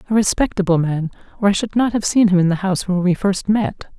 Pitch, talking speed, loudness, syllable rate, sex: 190 Hz, 255 wpm, -18 LUFS, 6.5 syllables/s, female